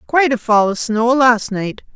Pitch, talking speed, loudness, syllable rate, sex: 235 Hz, 215 wpm, -15 LUFS, 4.6 syllables/s, female